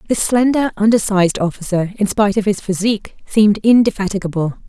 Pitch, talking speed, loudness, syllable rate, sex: 205 Hz, 140 wpm, -16 LUFS, 6.2 syllables/s, female